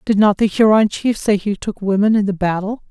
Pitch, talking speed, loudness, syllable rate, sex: 205 Hz, 250 wpm, -16 LUFS, 5.4 syllables/s, female